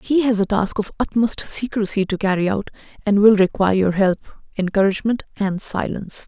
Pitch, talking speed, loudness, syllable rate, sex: 205 Hz, 170 wpm, -19 LUFS, 5.7 syllables/s, female